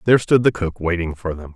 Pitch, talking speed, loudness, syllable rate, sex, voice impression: 95 Hz, 270 wpm, -19 LUFS, 6.4 syllables/s, male, very masculine, very thick, tensed, very powerful, slightly bright, soft, muffled, very fluent, very cool, intellectual, slightly refreshing, sincere, very calm, friendly, reassuring, very unique, elegant, wild, slightly sweet, lively, very kind, slightly intense